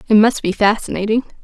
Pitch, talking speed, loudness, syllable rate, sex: 215 Hz, 165 wpm, -16 LUFS, 6.4 syllables/s, female